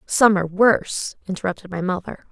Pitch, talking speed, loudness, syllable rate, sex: 195 Hz, 155 wpm, -20 LUFS, 6.0 syllables/s, female